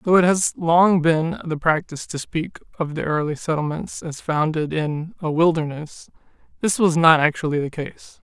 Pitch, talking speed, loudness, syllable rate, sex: 160 Hz, 175 wpm, -21 LUFS, 4.7 syllables/s, male